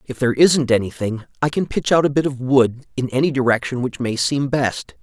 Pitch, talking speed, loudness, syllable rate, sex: 130 Hz, 225 wpm, -19 LUFS, 5.4 syllables/s, male